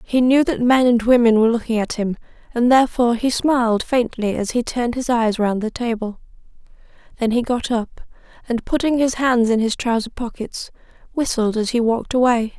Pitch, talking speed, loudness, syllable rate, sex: 235 Hz, 190 wpm, -19 LUFS, 5.5 syllables/s, female